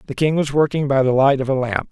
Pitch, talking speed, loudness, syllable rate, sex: 135 Hz, 315 wpm, -18 LUFS, 6.4 syllables/s, male